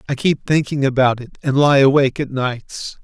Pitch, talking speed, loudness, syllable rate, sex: 135 Hz, 200 wpm, -17 LUFS, 5.0 syllables/s, male